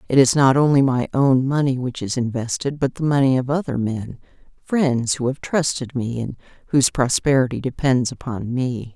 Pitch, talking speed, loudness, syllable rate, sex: 130 Hz, 175 wpm, -20 LUFS, 5.0 syllables/s, female